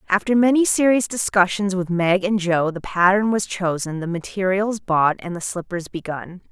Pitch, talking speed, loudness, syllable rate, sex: 190 Hz, 175 wpm, -20 LUFS, 4.8 syllables/s, female